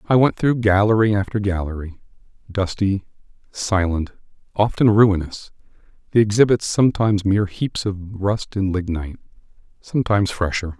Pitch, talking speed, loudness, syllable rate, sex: 100 Hz, 115 wpm, -19 LUFS, 5.1 syllables/s, male